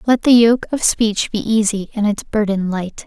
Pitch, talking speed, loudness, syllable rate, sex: 215 Hz, 215 wpm, -16 LUFS, 4.6 syllables/s, female